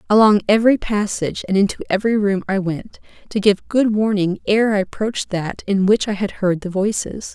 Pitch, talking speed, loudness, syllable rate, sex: 205 Hz, 195 wpm, -18 LUFS, 5.4 syllables/s, female